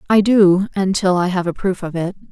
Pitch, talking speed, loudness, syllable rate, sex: 190 Hz, 235 wpm, -17 LUFS, 5.2 syllables/s, female